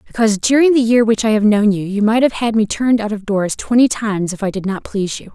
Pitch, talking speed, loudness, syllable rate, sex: 215 Hz, 290 wpm, -15 LUFS, 6.3 syllables/s, female